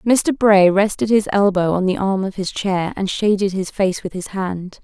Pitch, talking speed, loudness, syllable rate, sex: 195 Hz, 225 wpm, -18 LUFS, 4.5 syllables/s, female